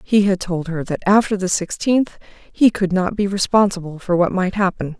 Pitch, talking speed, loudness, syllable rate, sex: 190 Hz, 205 wpm, -18 LUFS, 4.9 syllables/s, female